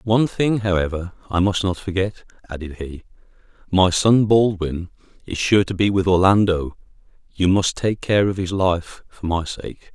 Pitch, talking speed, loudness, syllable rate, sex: 95 Hz, 170 wpm, -20 LUFS, 4.7 syllables/s, male